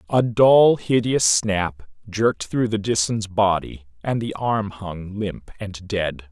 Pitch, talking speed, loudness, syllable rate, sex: 100 Hz, 150 wpm, -20 LUFS, 3.5 syllables/s, male